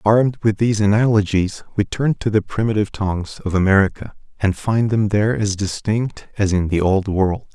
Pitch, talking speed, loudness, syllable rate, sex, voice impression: 105 Hz, 185 wpm, -19 LUFS, 5.4 syllables/s, male, very masculine, very adult-like, slightly thick, cool, sincere, calm, slightly mature